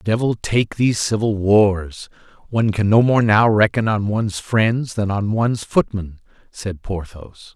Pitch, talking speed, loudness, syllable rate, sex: 105 Hz, 160 wpm, -18 LUFS, 4.3 syllables/s, male